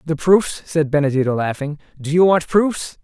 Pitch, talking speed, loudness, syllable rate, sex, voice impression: 155 Hz, 180 wpm, -17 LUFS, 5.0 syllables/s, male, masculine, adult-like, slightly fluent, slightly refreshing, sincere, slightly kind